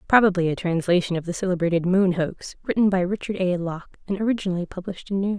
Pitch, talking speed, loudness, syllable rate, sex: 185 Hz, 210 wpm, -23 LUFS, 7.0 syllables/s, female